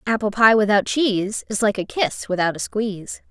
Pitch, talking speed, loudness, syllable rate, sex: 210 Hz, 200 wpm, -20 LUFS, 5.2 syllables/s, female